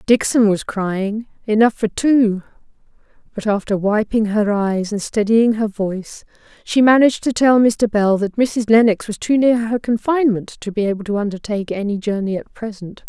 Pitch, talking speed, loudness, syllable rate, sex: 215 Hz, 170 wpm, -17 LUFS, 5.0 syllables/s, female